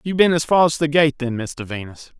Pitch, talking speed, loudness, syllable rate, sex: 145 Hz, 275 wpm, -18 LUFS, 5.9 syllables/s, male